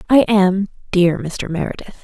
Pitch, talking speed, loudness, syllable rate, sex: 190 Hz, 150 wpm, -17 LUFS, 4.3 syllables/s, female